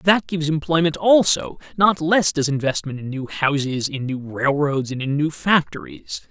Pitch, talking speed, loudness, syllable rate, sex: 155 Hz, 170 wpm, -20 LUFS, 4.7 syllables/s, male